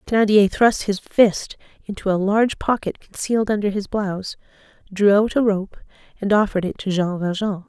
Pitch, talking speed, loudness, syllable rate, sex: 205 Hz, 170 wpm, -20 LUFS, 5.4 syllables/s, female